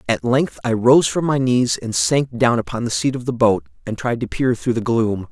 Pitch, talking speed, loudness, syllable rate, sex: 120 Hz, 260 wpm, -18 LUFS, 4.9 syllables/s, male